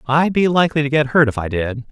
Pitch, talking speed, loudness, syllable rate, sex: 140 Hz, 280 wpm, -17 LUFS, 6.3 syllables/s, male